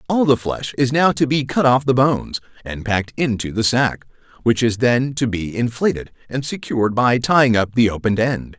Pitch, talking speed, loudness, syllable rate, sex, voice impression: 120 Hz, 210 wpm, -18 LUFS, 5.1 syllables/s, male, very masculine, very adult-like, middle-aged, very thick, very tensed, very powerful, very bright, hard, very clear, very fluent, slightly raspy, very cool, very intellectual, sincere, slightly calm, very mature, very friendly, very reassuring, very unique, slightly elegant, very wild, slightly sweet, very lively, kind, very intense